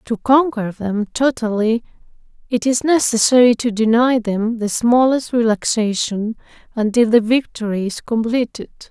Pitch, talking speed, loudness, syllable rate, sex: 230 Hz, 120 wpm, -17 LUFS, 4.5 syllables/s, female